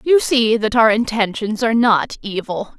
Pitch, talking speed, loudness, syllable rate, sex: 220 Hz, 170 wpm, -17 LUFS, 4.6 syllables/s, female